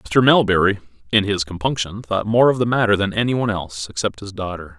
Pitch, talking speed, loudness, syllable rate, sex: 100 Hz, 215 wpm, -19 LUFS, 6.2 syllables/s, male